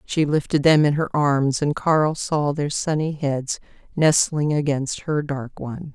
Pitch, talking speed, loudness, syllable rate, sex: 145 Hz, 170 wpm, -21 LUFS, 4.0 syllables/s, female